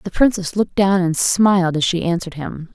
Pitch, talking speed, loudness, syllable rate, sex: 180 Hz, 220 wpm, -17 LUFS, 5.8 syllables/s, female